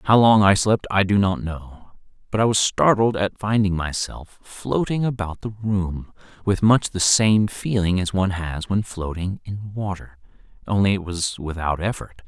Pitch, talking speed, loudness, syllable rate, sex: 100 Hz, 175 wpm, -21 LUFS, 4.4 syllables/s, male